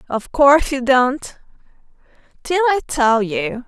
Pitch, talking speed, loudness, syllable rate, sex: 265 Hz, 115 wpm, -16 LUFS, 3.8 syllables/s, female